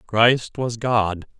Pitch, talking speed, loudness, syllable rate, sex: 115 Hz, 130 wpm, -20 LUFS, 2.6 syllables/s, male